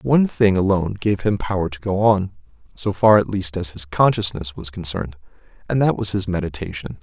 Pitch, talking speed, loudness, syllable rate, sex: 95 Hz, 195 wpm, -20 LUFS, 5.6 syllables/s, male